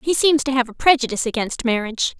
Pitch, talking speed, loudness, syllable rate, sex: 255 Hz, 220 wpm, -19 LUFS, 6.8 syllables/s, female